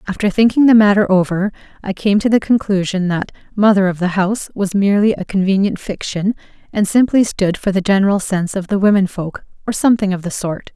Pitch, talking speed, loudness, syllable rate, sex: 200 Hz, 200 wpm, -15 LUFS, 5.9 syllables/s, female